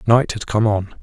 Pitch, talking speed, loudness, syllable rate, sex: 110 Hz, 235 wpm, -18 LUFS, 4.8 syllables/s, male